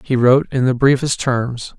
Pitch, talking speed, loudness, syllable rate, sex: 130 Hz, 200 wpm, -16 LUFS, 4.9 syllables/s, male